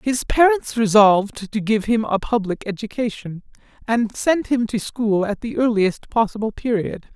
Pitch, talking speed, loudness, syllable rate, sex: 220 Hz, 160 wpm, -20 LUFS, 4.6 syllables/s, male